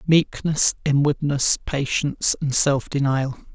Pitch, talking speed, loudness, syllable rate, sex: 140 Hz, 100 wpm, -20 LUFS, 3.8 syllables/s, male